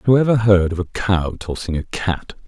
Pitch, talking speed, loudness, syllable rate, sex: 95 Hz, 220 wpm, -19 LUFS, 4.8 syllables/s, male